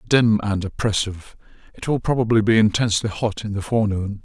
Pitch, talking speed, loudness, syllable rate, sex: 105 Hz, 170 wpm, -20 LUFS, 6.0 syllables/s, male